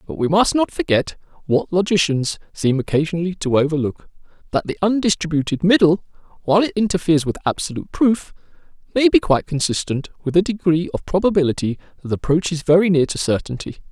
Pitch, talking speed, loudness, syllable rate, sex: 170 Hz, 155 wpm, -19 LUFS, 6.2 syllables/s, male